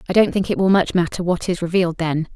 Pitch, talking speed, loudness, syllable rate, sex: 180 Hz, 280 wpm, -19 LUFS, 6.6 syllables/s, female